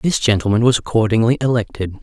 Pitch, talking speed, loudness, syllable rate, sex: 115 Hz, 150 wpm, -16 LUFS, 6.2 syllables/s, male